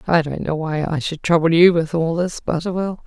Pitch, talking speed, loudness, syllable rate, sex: 165 Hz, 235 wpm, -19 LUFS, 5.3 syllables/s, female